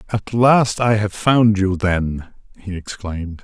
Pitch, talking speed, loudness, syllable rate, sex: 100 Hz, 155 wpm, -17 LUFS, 3.9 syllables/s, male